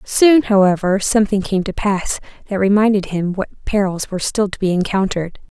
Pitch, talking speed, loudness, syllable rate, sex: 200 Hz, 170 wpm, -17 LUFS, 5.3 syllables/s, female